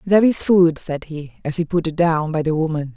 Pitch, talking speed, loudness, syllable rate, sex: 165 Hz, 265 wpm, -19 LUFS, 5.5 syllables/s, female